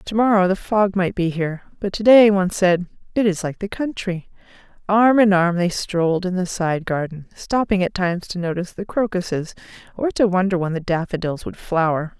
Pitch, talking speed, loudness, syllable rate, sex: 185 Hz, 190 wpm, -20 LUFS, 5.4 syllables/s, female